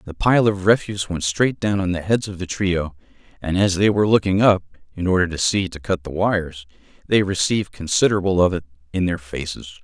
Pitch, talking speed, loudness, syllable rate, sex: 95 Hz, 215 wpm, -20 LUFS, 5.9 syllables/s, male